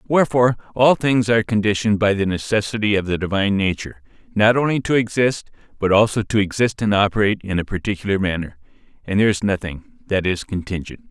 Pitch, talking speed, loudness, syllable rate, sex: 105 Hz, 180 wpm, -19 LUFS, 6.4 syllables/s, male